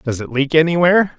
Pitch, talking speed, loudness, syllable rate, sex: 155 Hz, 205 wpm, -15 LUFS, 6.1 syllables/s, male